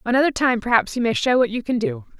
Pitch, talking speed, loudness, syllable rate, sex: 250 Hz, 275 wpm, -20 LUFS, 6.5 syllables/s, female